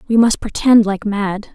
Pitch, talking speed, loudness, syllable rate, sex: 215 Hz, 195 wpm, -15 LUFS, 4.3 syllables/s, female